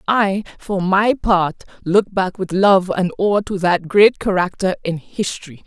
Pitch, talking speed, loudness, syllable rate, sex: 190 Hz, 170 wpm, -17 LUFS, 4.0 syllables/s, female